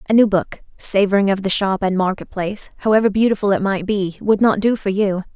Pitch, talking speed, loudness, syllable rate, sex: 200 Hz, 225 wpm, -18 LUFS, 5.9 syllables/s, female